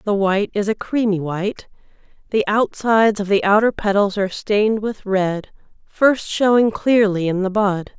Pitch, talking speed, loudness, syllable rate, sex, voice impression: 205 Hz, 165 wpm, -18 LUFS, 4.8 syllables/s, female, very feminine, slightly middle-aged, thin, slightly tensed, slightly weak, bright, slightly soft, clear, fluent, slightly raspy, slightly cute, intellectual, refreshing, sincere, very calm, very friendly, very reassuring, unique, elegant, slightly wild, sweet, kind, slightly sharp, light